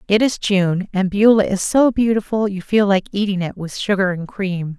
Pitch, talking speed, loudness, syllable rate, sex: 200 Hz, 215 wpm, -18 LUFS, 4.9 syllables/s, female